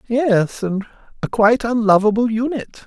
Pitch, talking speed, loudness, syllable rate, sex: 225 Hz, 125 wpm, -17 LUFS, 5.1 syllables/s, male